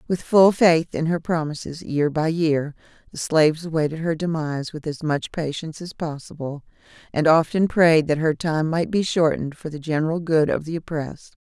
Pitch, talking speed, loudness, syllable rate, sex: 160 Hz, 190 wpm, -22 LUFS, 5.2 syllables/s, female